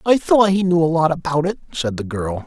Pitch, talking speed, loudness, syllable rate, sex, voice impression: 165 Hz, 270 wpm, -18 LUFS, 5.5 syllables/s, male, masculine, adult-like, slightly relaxed, powerful, raspy, sincere, mature, wild, strict, intense